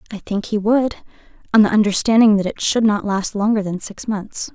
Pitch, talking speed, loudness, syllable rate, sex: 210 Hz, 200 wpm, -18 LUFS, 5.4 syllables/s, female